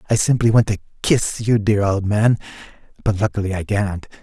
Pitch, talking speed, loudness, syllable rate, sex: 105 Hz, 185 wpm, -19 LUFS, 5.2 syllables/s, male